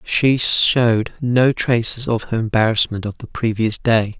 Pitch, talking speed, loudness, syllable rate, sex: 115 Hz, 155 wpm, -17 LUFS, 4.2 syllables/s, male